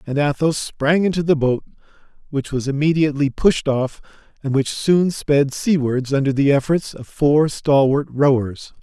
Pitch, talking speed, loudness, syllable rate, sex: 145 Hz, 155 wpm, -18 LUFS, 4.5 syllables/s, male